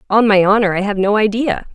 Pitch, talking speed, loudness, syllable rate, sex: 205 Hz, 240 wpm, -14 LUFS, 6.0 syllables/s, female